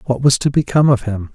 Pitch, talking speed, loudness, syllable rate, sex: 125 Hz, 270 wpm, -15 LUFS, 6.8 syllables/s, male